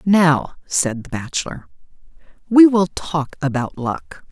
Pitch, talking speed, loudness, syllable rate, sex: 160 Hz, 125 wpm, -18 LUFS, 3.7 syllables/s, female